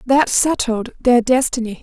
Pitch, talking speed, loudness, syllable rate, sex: 245 Hz, 130 wpm, -16 LUFS, 4.3 syllables/s, female